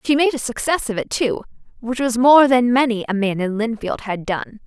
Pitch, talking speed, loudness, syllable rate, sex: 235 Hz, 230 wpm, -18 LUFS, 5.1 syllables/s, female